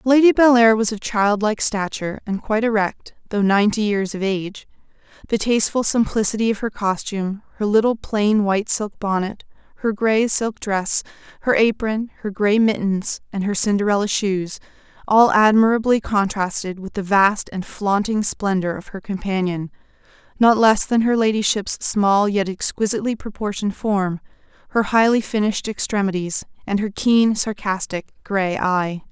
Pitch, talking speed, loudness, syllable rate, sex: 205 Hz, 145 wpm, -19 LUFS, 4.9 syllables/s, female